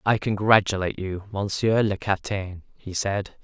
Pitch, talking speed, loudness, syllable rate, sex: 100 Hz, 140 wpm, -24 LUFS, 5.1 syllables/s, male